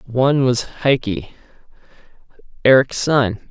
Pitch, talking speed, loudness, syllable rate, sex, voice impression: 125 Hz, 85 wpm, -17 LUFS, 4.4 syllables/s, male, masculine, adult-like, tensed, slightly bright, soft, clear, slightly halting, cool, intellectual, mature, friendly, wild, lively, slightly intense